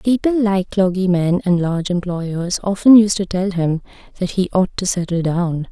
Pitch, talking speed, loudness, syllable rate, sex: 185 Hz, 180 wpm, -17 LUFS, 4.7 syllables/s, female